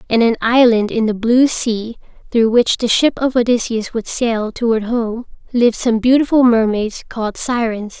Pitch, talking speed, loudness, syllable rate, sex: 230 Hz, 175 wpm, -15 LUFS, 4.6 syllables/s, female